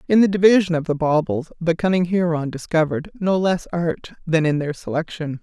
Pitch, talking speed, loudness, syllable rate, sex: 170 Hz, 190 wpm, -20 LUFS, 5.5 syllables/s, female